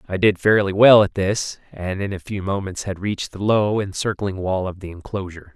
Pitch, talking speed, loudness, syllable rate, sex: 100 Hz, 215 wpm, -20 LUFS, 5.3 syllables/s, male